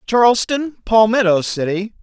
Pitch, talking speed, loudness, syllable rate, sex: 215 Hz, 90 wpm, -16 LUFS, 4.5 syllables/s, male